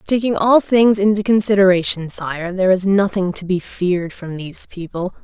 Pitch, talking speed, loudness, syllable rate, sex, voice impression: 190 Hz, 170 wpm, -17 LUFS, 5.2 syllables/s, female, very feminine, young, thin, tensed, slightly powerful, bright, slightly soft, clear, fluent, slightly raspy, very cute, intellectual, refreshing, very sincere, calm, very friendly, very reassuring, unique, very elegant, slightly wild, sweet, lively, kind, slightly intense, slightly modest, light